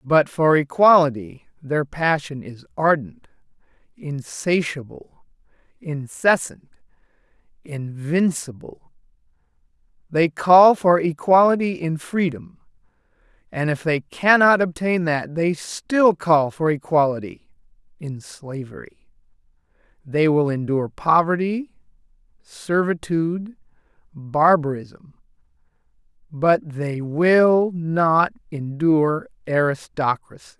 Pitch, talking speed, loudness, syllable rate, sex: 160 Hz, 80 wpm, -20 LUFS, 3.6 syllables/s, male